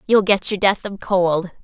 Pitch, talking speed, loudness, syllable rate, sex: 190 Hz, 220 wpm, -18 LUFS, 4.4 syllables/s, female